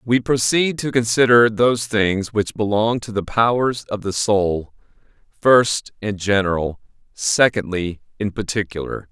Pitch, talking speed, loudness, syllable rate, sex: 110 Hz, 130 wpm, -19 LUFS, 4.2 syllables/s, male